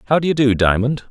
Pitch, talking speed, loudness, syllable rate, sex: 130 Hz, 270 wpm, -16 LUFS, 6.9 syllables/s, male